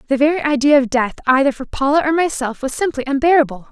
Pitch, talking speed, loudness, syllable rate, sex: 275 Hz, 210 wpm, -16 LUFS, 6.5 syllables/s, female